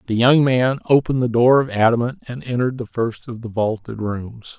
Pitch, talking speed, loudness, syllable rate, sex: 120 Hz, 210 wpm, -19 LUFS, 5.4 syllables/s, male